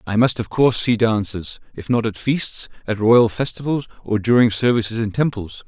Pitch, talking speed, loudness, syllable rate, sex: 115 Hz, 190 wpm, -19 LUFS, 5.2 syllables/s, male